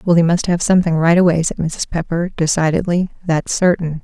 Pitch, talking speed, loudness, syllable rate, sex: 170 Hz, 195 wpm, -16 LUFS, 5.8 syllables/s, female